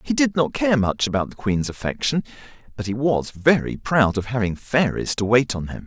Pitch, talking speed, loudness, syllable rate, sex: 125 Hz, 215 wpm, -21 LUFS, 5.2 syllables/s, male